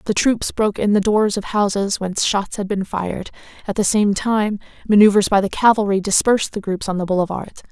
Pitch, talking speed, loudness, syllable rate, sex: 205 Hz, 210 wpm, -18 LUFS, 5.7 syllables/s, female